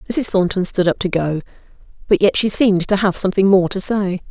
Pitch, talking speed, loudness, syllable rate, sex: 190 Hz, 225 wpm, -17 LUFS, 5.9 syllables/s, female